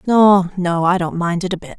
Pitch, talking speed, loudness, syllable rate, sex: 180 Hz, 270 wpm, -16 LUFS, 5.0 syllables/s, female